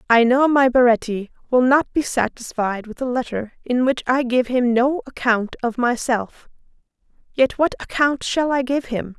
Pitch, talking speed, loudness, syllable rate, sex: 250 Hz, 175 wpm, -19 LUFS, 4.6 syllables/s, female